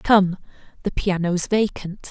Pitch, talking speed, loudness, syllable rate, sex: 190 Hz, 115 wpm, -22 LUFS, 3.7 syllables/s, female